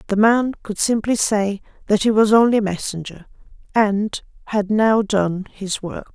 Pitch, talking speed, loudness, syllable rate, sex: 210 Hz, 165 wpm, -19 LUFS, 4.4 syllables/s, female